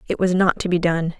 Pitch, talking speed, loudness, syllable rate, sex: 175 Hz, 300 wpm, -19 LUFS, 5.7 syllables/s, female